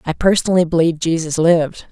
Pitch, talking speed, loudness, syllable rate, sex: 165 Hz, 155 wpm, -16 LUFS, 6.6 syllables/s, female